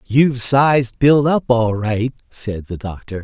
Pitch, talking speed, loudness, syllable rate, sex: 120 Hz, 165 wpm, -17 LUFS, 4.1 syllables/s, male